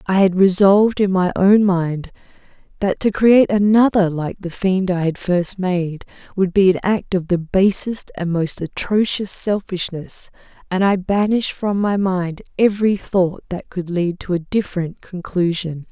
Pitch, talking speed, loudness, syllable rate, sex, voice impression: 190 Hz, 165 wpm, -18 LUFS, 4.4 syllables/s, female, feminine, adult-like, slightly relaxed, powerful, slightly soft, slightly clear, raspy, intellectual, calm, slightly reassuring, elegant, lively, slightly sharp